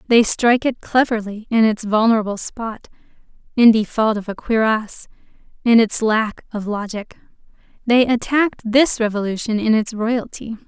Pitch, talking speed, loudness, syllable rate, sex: 225 Hz, 140 wpm, -18 LUFS, 4.8 syllables/s, female